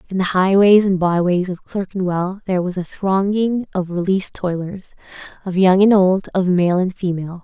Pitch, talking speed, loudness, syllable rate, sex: 185 Hz, 175 wpm, -17 LUFS, 5.0 syllables/s, female